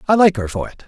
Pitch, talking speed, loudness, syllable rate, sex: 160 Hz, 345 wpm, -17 LUFS, 7.0 syllables/s, male